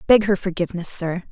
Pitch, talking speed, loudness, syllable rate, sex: 185 Hz, 180 wpm, -20 LUFS, 6.2 syllables/s, female